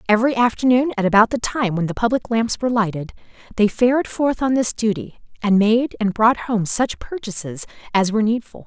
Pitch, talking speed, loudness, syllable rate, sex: 225 Hz, 195 wpm, -19 LUFS, 5.6 syllables/s, female